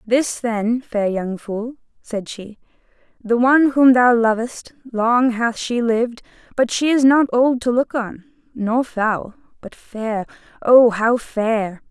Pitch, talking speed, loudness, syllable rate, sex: 235 Hz, 150 wpm, -18 LUFS, 3.6 syllables/s, female